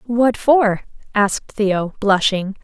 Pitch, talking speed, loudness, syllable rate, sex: 215 Hz, 115 wpm, -17 LUFS, 3.3 syllables/s, female